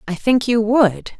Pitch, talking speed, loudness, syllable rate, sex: 220 Hz, 200 wpm, -16 LUFS, 4.0 syllables/s, female